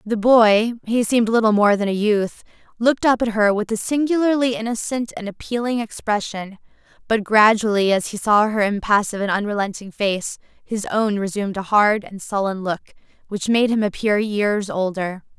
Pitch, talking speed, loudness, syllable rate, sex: 215 Hz, 165 wpm, -19 LUFS, 5.1 syllables/s, female